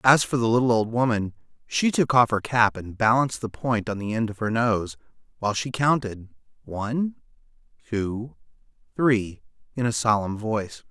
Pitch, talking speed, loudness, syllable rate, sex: 115 Hz, 170 wpm, -24 LUFS, 5.0 syllables/s, male